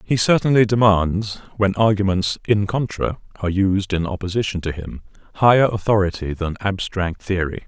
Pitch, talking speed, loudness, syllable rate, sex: 100 Hz, 140 wpm, -19 LUFS, 5.1 syllables/s, male